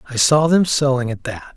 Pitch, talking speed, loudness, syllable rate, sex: 135 Hz, 230 wpm, -17 LUFS, 5.6 syllables/s, male